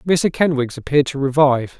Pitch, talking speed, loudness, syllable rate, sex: 140 Hz, 165 wpm, -17 LUFS, 6.0 syllables/s, male